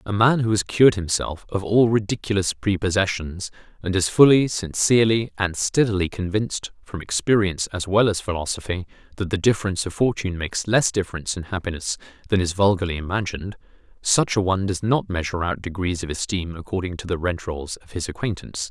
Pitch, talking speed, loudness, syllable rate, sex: 95 Hz, 180 wpm, -22 LUFS, 6.1 syllables/s, male